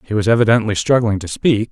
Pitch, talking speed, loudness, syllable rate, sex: 110 Hz, 210 wpm, -16 LUFS, 6.5 syllables/s, male